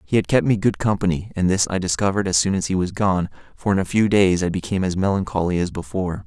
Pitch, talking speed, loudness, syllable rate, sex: 95 Hz, 260 wpm, -20 LUFS, 6.7 syllables/s, male